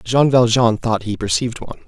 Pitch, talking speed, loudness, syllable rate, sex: 115 Hz, 190 wpm, -17 LUFS, 6.1 syllables/s, male